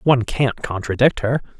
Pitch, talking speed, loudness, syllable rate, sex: 120 Hz, 150 wpm, -19 LUFS, 5.3 syllables/s, male